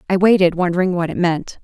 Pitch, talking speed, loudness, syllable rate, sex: 180 Hz, 220 wpm, -16 LUFS, 6.2 syllables/s, female